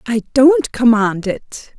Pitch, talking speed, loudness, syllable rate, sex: 225 Hz, 135 wpm, -14 LUFS, 3.3 syllables/s, female